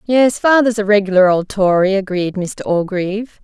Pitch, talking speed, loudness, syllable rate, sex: 200 Hz, 155 wpm, -15 LUFS, 4.9 syllables/s, female